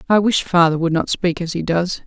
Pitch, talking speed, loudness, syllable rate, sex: 175 Hz, 260 wpm, -18 LUFS, 5.3 syllables/s, female